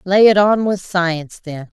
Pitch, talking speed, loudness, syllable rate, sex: 185 Hz, 200 wpm, -15 LUFS, 4.5 syllables/s, female